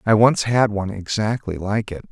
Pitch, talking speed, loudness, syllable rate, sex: 105 Hz, 200 wpm, -20 LUFS, 5.2 syllables/s, male